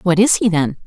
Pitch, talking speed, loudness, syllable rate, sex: 185 Hz, 280 wpm, -15 LUFS, 5.3 syllables/s, female